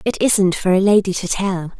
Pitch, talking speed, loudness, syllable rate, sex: 190 Hz, 235 wpm, -17 LUFS, 4.9 syllables/s, female